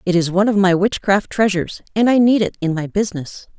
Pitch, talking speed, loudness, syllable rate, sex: 195 Hz, 235 wpm, -17 LUFS, 6.2 syllables/s, female